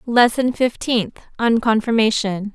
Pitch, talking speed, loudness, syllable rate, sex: 230 Hz, 95 wpm, -18 LUFS, 4.0 syllables/s, female